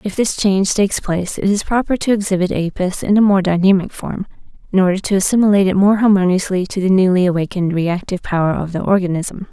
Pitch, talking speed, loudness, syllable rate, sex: 190 Hz, 200 wpm, -16 LUFS, 6.5 syllables/s, female